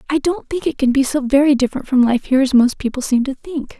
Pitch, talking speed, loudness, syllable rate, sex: 270 Hz, 285 wpm, -17 LUFS, 6.5 syllables/s, female